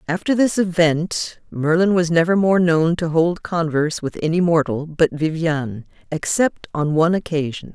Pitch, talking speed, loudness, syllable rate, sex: 165 Hz, 155 wpm, -19 LUFS, 4.7 syllables/s, female